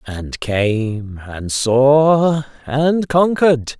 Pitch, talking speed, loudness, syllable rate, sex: 135 Hz, 95 wpm, -16 LUFS, 2.3 syllables/s, male